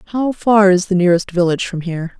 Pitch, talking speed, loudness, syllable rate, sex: 190 Hz, 220 wpm, -15 LUFS, 6.2 syllables/s, female